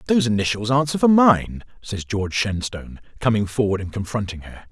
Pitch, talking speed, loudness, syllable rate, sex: 110 Hz, 165 wpm, -20 LUFS, 5.8 syllables/s, male